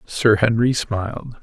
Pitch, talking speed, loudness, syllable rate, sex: 115 Hz, 125 wpm, -19 LUFS, 3.8 syllables/s, male